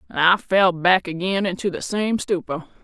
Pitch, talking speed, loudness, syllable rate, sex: 185 Hz, 170 wpm, -20 LUFS, 4.4 syllables/s, female